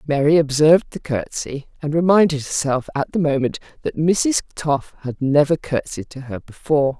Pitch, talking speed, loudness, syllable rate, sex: 145 Hz, 165 wpm, -19 LUFS, 4.9 syllables/s, female